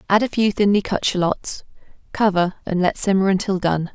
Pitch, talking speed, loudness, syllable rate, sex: 190 Hz, 180 wpm, -19 LUFS, 5.3 syllables/s, female